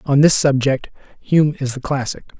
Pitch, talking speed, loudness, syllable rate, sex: 140 Hz, 175 wpm, -17 LUFS, 5.0 syllables/s, male